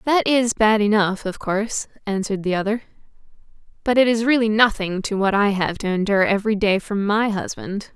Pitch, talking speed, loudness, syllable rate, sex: 210 Hz, 190 wpm, -20 LUFS, 5.6 syllables/s, female